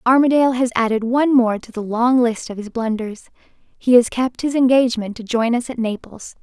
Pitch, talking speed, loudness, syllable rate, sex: 240 Hz, 205 wpm, -18 LUFS, 5.6 syllables/s, female